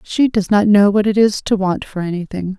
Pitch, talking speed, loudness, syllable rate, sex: 200 Hz, 255 wpm, -15 LUFS, 5.2 syllables/s, female